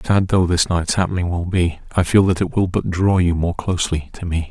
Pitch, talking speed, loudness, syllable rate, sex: 90 Hz, 255 wpm, -19 LUFS, 5.5 syllables/s, male